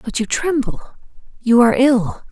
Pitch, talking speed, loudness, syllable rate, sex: 255 Hz, 130 wpm, -16 LUFS, 4.8 syllables/s, female